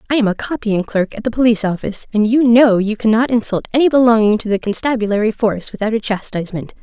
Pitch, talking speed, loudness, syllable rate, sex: 220 Hz, 210 wpm, -16 LUFS, 6.7 syllables/s, female